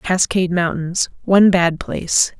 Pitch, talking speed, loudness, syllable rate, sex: 175 Hz, 100 wpm, -17 LUFS, 4.7 syllables/s, female